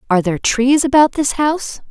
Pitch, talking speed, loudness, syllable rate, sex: 260 Hz, 190 wpm, -15 LUFS, 6.1 syllables/s, female